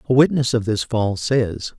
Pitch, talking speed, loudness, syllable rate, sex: 115 Hz, 200 wpm, -19 LUFS, 4.3 syllables/s, male